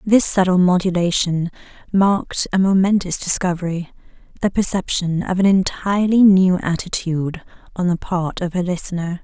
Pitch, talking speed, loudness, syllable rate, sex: 180 Hz, 125 wpm, -18 LUFS, 5.1 syllables/s, female